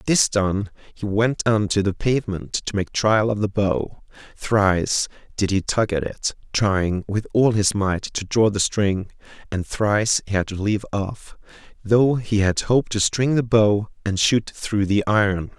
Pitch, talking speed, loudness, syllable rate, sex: 105 Hz, 190 wpm, -21 LUFS, 4.2 syllables/s, male